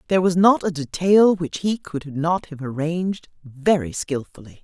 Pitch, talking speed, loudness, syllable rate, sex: 165 Hz, 170 wpm, -21 LUFS, 4.7 syllables/s, female